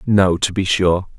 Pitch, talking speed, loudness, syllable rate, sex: 95 Hz, 200 wpm, -17 LUFS, 3.9 syllables/s, male